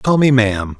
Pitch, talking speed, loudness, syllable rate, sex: 120 Hz, 230 wpm, -14 LUFS, 5.3 syllables/s, male